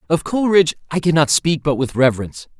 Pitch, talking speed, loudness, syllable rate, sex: 150 Hz, 210 wpm, -17 LUFS, 6.9 syllables/s, male